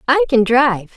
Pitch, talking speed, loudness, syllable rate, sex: 235 Hz, 190 wpm, -14 LUFS, 5.6 syllables/s, female